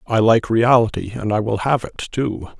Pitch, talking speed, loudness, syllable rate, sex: 115 Hz, 210 wpm, -18 LUFS, 4.7 syllables/s, male